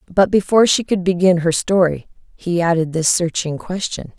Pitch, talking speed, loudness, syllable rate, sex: 175 Hz, 170 wpm, -17 LUFS, 5.3 syllables/s, female